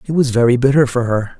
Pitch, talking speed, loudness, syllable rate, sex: 125 Hz, 260 wpm, -15 LUFS, 6.3 syllables/s, male